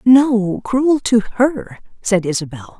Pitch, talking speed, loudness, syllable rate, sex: 220 Hz, 130 wpm, -16 LUFS, 3.3 syllables/s, female